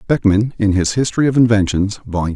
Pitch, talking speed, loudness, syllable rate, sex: 105 Hz, 180 wpm, -16 LUFS, 6.0 syllables/s, male